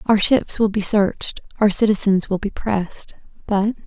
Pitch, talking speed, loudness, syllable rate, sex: 205 Hz, 155 wpm, -19 LUFS, 4.7 syllables/s, female